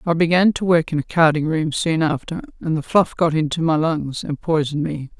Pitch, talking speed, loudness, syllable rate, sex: 160 Hz, 230 wpm, -19 LUFS, 5.4 syllables/s, female